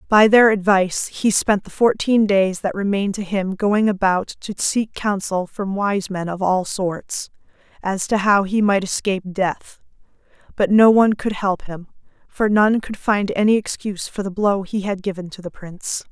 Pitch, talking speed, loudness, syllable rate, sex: 200 Hz, 190 wpm, -19 LUFS, 4.7 syllables/s, female